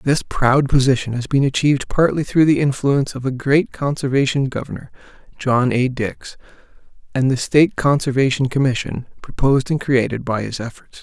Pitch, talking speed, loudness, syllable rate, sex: 135 Hz, 160 wpm, -18 LUFS, 5.4 syllables/s, male